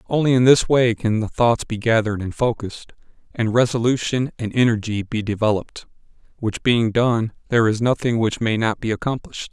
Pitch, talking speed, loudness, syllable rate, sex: 115 Hz, 175 wpm, -20 LUFS, 5.7 syllables/s, male